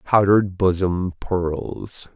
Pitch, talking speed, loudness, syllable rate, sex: 90 Hz, 85 wpm, -21 LUFS, 3.0 syllables/s, male